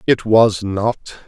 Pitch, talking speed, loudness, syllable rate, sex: 105 Hz, 140 wpm, -16 LUFS, 2.8 syllables/s, male